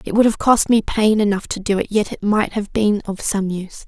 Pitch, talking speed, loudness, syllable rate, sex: 210 Hz, 280 wpm, -18 LUFS, 5.4 syllables/s, female